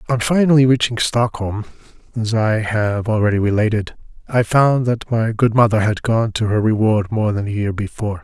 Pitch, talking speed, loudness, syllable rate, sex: 110 Hz, 180 wpm, -17 LUFS, 5.1 syllables/s, male